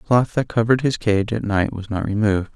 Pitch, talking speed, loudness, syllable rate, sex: 110 Hz, 260 wpm, -20 LUFS, 6.0 syllables/s, male